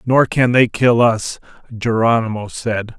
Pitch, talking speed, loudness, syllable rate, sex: 115 Hz, 140 wpm, -16 LUFS, 4.0 syllables/s, male